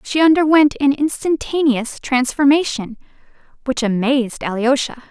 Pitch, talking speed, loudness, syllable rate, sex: 270 Hz, 95 wpm, -17 LUFS, 4.7 syllables/s, female